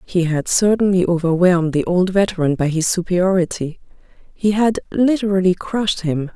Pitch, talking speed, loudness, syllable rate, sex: 180 Hz, 140 wpm, -17 LUFS, 5.2 syllables/s, female